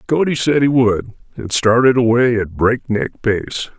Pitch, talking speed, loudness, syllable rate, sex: 120 Hz, 160 wpm, -16 LUFS, 4.2 syllables/s, male